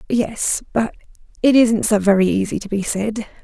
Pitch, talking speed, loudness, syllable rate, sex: 215 Hz, 155 wpm, -18 LUFS, 4.9 syllables/s, female